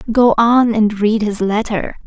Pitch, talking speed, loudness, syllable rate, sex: 220 Hz, 175 wpm, -15 LUFS, 4.0 syllables/s, female